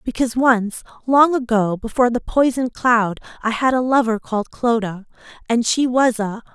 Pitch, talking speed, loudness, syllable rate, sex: 235 Hz, 165 wpm, -18 LUFS, 5.0 syllables/s, female